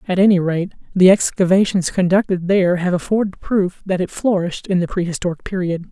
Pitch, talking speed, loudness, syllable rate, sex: 185 Hz, 175 wpm, -17 LUFS, 5.8 syllables/s, female